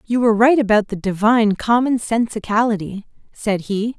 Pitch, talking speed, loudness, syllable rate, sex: 220 Hz, 150 wpm, -17 LUFS, 5.3 syllables/s, female